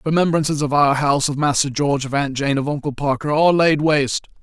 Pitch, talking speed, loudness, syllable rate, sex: 145 Hz, 215 wpm, -18 LUFS, 6.0 syllables/s, male